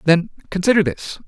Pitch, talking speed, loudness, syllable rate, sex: 175 Hz, 140 wpm, -18 LUFS, 5.7 syllables/s, male